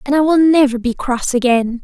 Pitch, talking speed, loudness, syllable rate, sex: 265 Hz, 230 wpm, -14 LUFS, 5.2 syllables/s, female